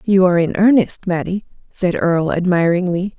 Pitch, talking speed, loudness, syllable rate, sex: 180 Hz, 150 wpm, -16 LUFS, 5.3 syllables/s, female